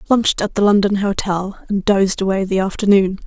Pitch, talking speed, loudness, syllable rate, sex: 195 Hz, 185 wpm, -17 LUFS, 5.8 syllables/s, female